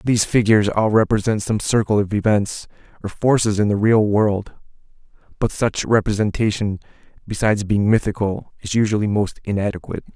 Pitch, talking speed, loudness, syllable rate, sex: 105 Hz, 140 wpm, -19 LUFS, 5.6 syllables/s, male